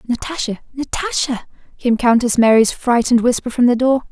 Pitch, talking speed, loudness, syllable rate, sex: 245 Hz, 145 wpm, -16 LUFS, 5.4 syllables/s, female